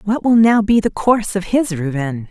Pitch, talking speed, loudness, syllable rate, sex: 200 Hz, 235 wpm, -16 LUFS, 5.5 syllables/s, female